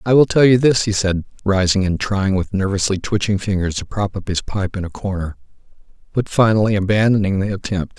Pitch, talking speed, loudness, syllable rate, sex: 100 Hz, 205 wpm, -18 LUFS, 5.6 syllables/s, male